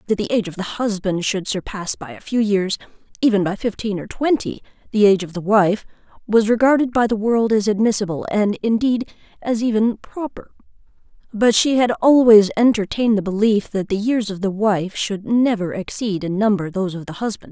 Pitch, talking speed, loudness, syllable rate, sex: 210 Hz, 185 wpm, -19 LUFS, 5.4 syllables/s, female